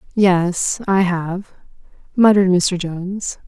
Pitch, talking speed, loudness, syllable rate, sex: 185 Hz, 105 wpm, -17 LUFS, 3.7 syllables/s, female